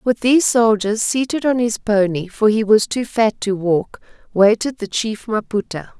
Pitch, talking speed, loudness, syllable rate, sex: 220 Hz, 180 wpm, -17 LUFS, 4.5 syllables/s, female